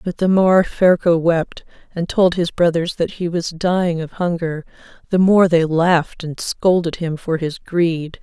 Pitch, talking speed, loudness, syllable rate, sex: 170 Hz, 180 wpm, -17 LUFS, 4.2 syllables/s, female